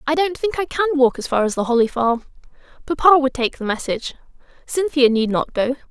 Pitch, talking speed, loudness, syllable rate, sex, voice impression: 270 Hz, 215 wpm, -19 LUFS, 5.8 syllables/s, female, feminine, adult-like, tensed, powerful, soft, slightly muffled, slightly nasal, slightly intellectual, calm, friendly, reassuring, lively, kind, slightly modest